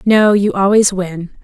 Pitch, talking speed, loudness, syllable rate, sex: 195 Hz, 170 wpm, -13 LUFS, 3.8 syllables/s, female